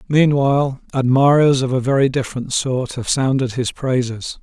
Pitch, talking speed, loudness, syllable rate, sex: 130 Hz, 150 wpm, -17 LUFS, 4.8 syllables/s, male